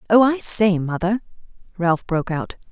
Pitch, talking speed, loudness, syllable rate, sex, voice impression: 195 Hz, 155 wpm, -19 LUFS, 4.8 syllables/s, female, feminine, adult-like, tensed, powerful, hard, clear, intellectual, calm, elegant, lively, strict, slightly sharp